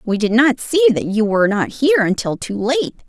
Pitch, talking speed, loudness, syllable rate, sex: 235 Hz, 235 wpm, -16 LUFS, 5.3 syllables/s, female